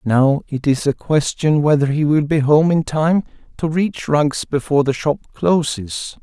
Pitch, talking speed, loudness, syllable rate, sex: 145 Hz, 185 wpm, -17 LUFS, 4.3 syllables/s, male